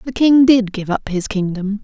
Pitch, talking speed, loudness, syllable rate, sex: 215 Hz, 230 wpm, -16 LUFS, 4.7 syllables/s, female